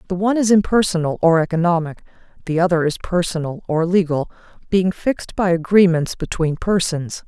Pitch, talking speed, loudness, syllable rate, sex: 175 Hz, 150 wpm, -18 LUFS, 5.5 syllables/s, female